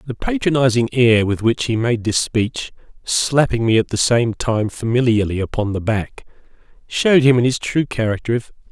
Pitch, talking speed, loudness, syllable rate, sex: 120 Hz, 185 wpm, -17 LUFS, 5.4 syllables/s, male